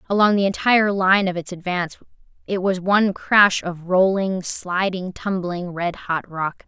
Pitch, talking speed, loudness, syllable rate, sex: 185 Hz, 160 wpm, -20 LUFS, 4.6 syllables/s, female